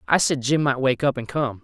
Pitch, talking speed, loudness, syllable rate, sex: 135 Hz, 295 wpm, -21 LUFS, 5.4 syllables/s, male